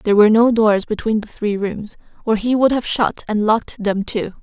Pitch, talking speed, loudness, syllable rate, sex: 215 Hz, 230 wpm, -17 LUFS, 5.3 syllables/s, female